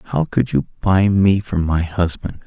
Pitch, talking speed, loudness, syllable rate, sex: 95 Hz, 195 wpm, -18 LUFS, 4.0 syllables/s, male